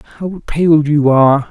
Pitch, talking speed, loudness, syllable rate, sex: 150 Hz, 160 wpm, -12 LUFS, 4.8 syllables/s, male